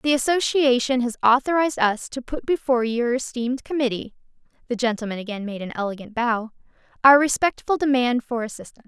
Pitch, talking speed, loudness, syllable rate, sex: 250 Hz, 140 wpm, -22 LUFS, 6.0 syllables/s, female